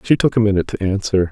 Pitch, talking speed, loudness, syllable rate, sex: 105 Hz, 275 wpm, -17 LUFS, 7.4 syllables/s, male